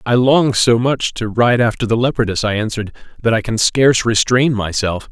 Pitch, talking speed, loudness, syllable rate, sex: 115 Hz, 200 wpm, -15 LUFS, 5.4 syllables/s, male